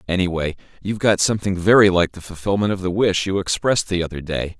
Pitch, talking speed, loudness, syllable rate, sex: 95 Hz, 220 wpm, -19 LUFS, 6.5 syllables/s, male